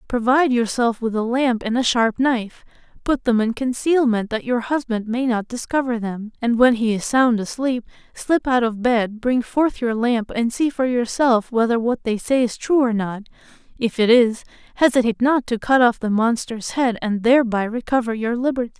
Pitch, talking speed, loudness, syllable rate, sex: 240 Hz, 200 wpm, -19 LUFS, 5.0 syllables/s, female